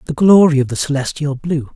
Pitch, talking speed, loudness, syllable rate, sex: 150 Hz, 205 wpm, -15 LUFS, 5.7 syllables/s, male